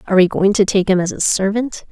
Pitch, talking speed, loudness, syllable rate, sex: 195 Hz, 280 wpm, -16 LUFS, 6.3 syllables/s, female